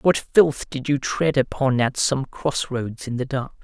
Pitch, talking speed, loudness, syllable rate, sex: 135 Hz, 200 wpm, -22 LUFS, 4.0 syllables/s, male